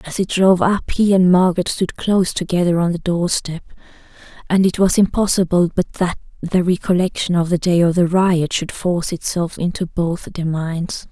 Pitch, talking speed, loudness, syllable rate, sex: 175 Hz, 190 wpm, -17 LUFS, 5.1 syllables/s, female